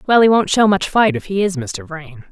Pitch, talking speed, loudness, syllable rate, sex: 200 Hz, 285 wpm, -15 LUFS, 5.1 syllables/s, female